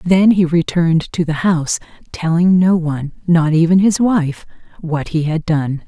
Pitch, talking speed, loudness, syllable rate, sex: 170 Hz, 175 wpm, -15 LUFS, 4.6 syllables/s, female